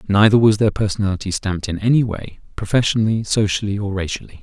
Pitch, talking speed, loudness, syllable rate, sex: 100 Hz, 165 wpm, -18 LUFS, 6.6 syllables/s, male